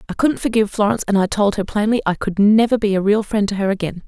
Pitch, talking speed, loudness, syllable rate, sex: 205 Hz, 280 wpm, -17 LUFS, 6.8 syllables/s, female